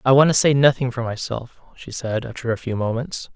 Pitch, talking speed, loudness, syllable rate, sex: 125 Hz, 235 wpm, -20 LUFS, 5.5 syllables/s, male